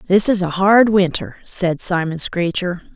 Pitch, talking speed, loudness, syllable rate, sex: 185 Hz, 160 wpm, -17 LUFS, 4.2 syllables/s, female